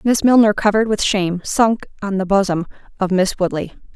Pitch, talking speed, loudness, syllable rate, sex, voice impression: 200 Hz, 180 wpm, -17 LUFS, 5.8 syllables/s, female, very feminine, very young, relaxed, weak, slightly dark, soft, muffled, slightly halting, slightly raspy, cute, intellectual, refreshing, slightly sincere, slightly calm, friendly, slightly reassuring, elegant, slightly sweet, kind, very modest